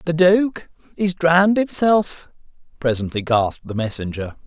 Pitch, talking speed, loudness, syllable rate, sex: 160 Hz, 120 wpm, -19 LUFS, 4.6 syllables/s, male